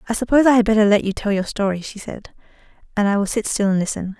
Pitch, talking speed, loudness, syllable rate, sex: 210 Hz, 270 wpm, -18 LUFS, 7.1 syllables/s, female